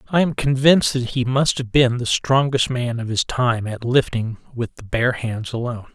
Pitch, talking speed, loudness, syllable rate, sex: 125 Hz, 210 wpm, -20 LUFS, 4.9 syllables/s, male